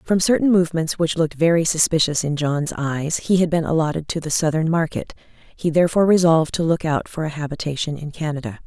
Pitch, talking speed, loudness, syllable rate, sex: 160 Hz, 200 wpm, -20 LUFS, 6.1 syllables/s, female